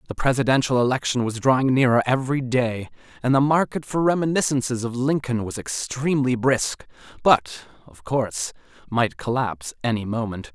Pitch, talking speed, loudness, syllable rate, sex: 125 Hz, 140 wpm, -22 LUFS, 5.4 syllables/s, male